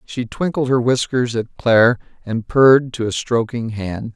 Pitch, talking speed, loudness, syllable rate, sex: 120 Hz, 175 wpm, -18 LUFS, 4.5 syllables/s, male